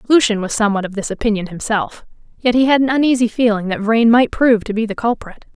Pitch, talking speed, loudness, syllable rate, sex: 225 Hz, 225 wpm, -16 LUFS, 6.4 syllables/s, female